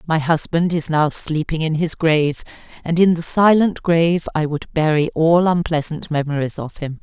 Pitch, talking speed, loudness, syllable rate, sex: 160 Hz, 180 wpm, -18 LUFS, 4.9 syllables/s, female